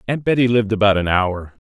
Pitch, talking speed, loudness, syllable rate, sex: 105 Hz, 210 wpm, -17 LUFS, 6.3 syllables/s, male